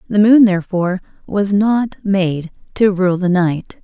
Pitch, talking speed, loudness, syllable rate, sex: 190 Hz, 155 wpm, -15 LUFS, 4.3 syllables/s, female